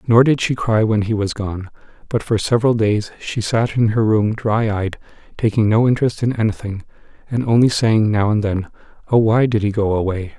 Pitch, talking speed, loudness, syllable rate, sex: 110 Hz, 210 wpm, -18 LUFS, 5.3 syllables/s, male